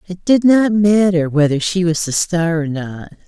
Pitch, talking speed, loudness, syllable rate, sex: 175 Hz, 200 wpm, -15 LUFS, 4.4 syllables/s, female